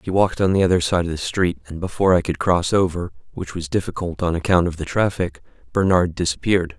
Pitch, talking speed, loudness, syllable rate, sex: 90 Hz, 220 wpm, -20 LUFS, 6.3 syllables/s, male